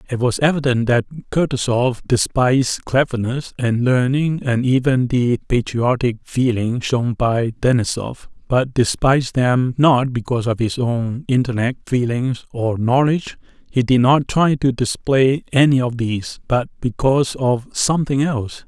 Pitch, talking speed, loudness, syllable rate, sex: 125 Hz, 130 wpm, -18 LUFS, 4.4 syllables/s, male